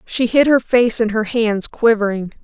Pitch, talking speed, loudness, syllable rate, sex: 225 Hz, 195 wpm, -16 LUFS, 4.5 syllables/s, female